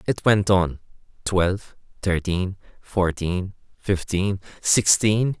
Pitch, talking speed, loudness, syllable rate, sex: 95 Hz, 80 wpm, -22 LUFS, 3.4 syllables/s, male